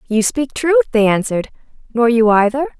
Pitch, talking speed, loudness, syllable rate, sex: 230 Hz, 170 wpm, -15 LUFS, 5.5 syllables/s, female